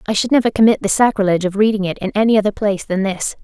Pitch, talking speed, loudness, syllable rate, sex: 205 Hz, 260 wpm, -16 LUFS, 7.6 syllables/s, female